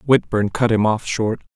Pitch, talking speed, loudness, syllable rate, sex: 115 Hz, 195 wpm, -19 LUFS, 4.2 syllables/s, male